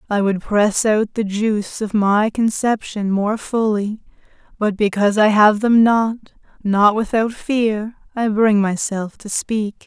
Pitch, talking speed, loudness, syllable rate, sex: 210 Hz, 150 wpm, -18 LUFS, 3.9 syllables/s, female